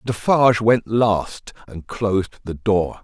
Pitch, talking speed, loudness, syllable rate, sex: 105 Hz, 140 wpm, -19 LUFS, 3.8 syllables/s, male